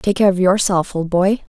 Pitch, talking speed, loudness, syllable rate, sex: 185 Hz, 235 wpm, -16 LUFS, 4.9 syllables/s, female